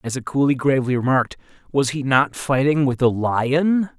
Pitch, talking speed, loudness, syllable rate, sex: 135 Hz, 180 wpm, -19 LUFS, 5.1 syllables/s, male